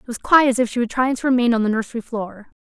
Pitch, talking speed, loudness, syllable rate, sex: 240 Hz, 320 wpm, -19 LUFS, 7.6 syllables/s, female